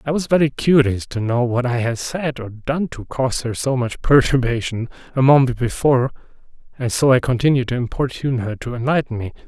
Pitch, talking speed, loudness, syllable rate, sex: 130 Hz, 195 wpm, -19 LUFS, 5.7 syllables/s, male